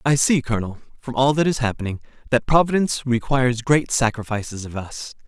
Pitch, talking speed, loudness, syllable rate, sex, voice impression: 125 Hz, 170 wpm, -21 LUFS, 6.0 syllables/s, male, very masculine, very adult-like, slightly thick, very tensed, slightly powerful, very bright, soft, very clear, very fluent, slightly raspy, cool, intellectual, very refreshing, sincere, slightly calm, very friendly, very reassuring, unique, elegant, wild, sweet, very lively, kind, intense